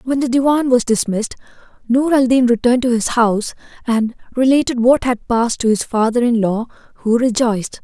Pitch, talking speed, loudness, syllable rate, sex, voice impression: 240 Hz, 185 wpm, -16 LUFS, 5.7 syllables/s, female, very feminine, slightly adult-like, thin, relaxed, very powerful, slightly dark, hard, muffled, fluent, very raspy, cool, intellectual, slightly refreshing, slightly sincere, calm, slightly friendly, slightly reassuring, very unique, slightly elegant, very wild, slightly sweet, lively, kind, slightly intense, sharp, slightly modest, light